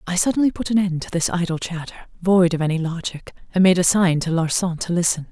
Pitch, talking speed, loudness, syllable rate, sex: 175 Hz, 225 wpm, -20 LUFS, 6.1 syllables/s, female